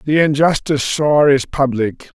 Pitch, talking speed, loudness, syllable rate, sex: 140 Hz, 135 wpm, -15 LUFS, 4.6 syllables/s, male